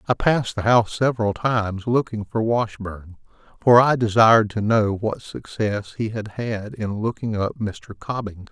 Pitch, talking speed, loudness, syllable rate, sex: 110 Hz, 170 wpm, -21 LUFS, 4.9 syllables/s, male